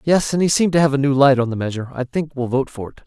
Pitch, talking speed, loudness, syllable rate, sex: 140 Hz, 350 wpm, -18 LUFS, 7.3 syllables/s, male